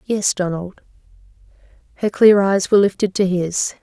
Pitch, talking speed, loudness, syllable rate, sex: 195 Hz, 140 wpm, -17 LUFS, 4.8 syllables/s, female